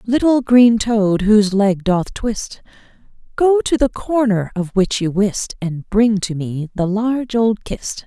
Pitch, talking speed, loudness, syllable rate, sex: 215 Hz, 170 wpm, -17 LUFS, 3.8 syllables/s, female